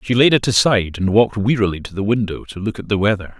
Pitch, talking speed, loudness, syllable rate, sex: 105 Hz, 265 wpm, -17 LUFS, 6.8 syllables/s, male